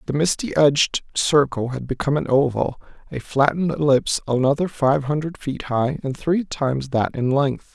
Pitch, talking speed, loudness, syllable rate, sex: 140 Hz, 170 wpm, -21 LUFS, 5.1 syllables/s, male